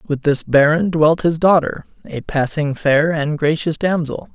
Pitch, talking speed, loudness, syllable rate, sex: 155 Hz, 165 wpm, -16 LUFS, 4.2 syllables/s, male